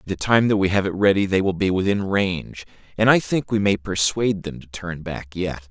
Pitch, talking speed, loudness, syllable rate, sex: 95 Hz, 250 wpm, -21 LUFS, 5.6 syllables/s, male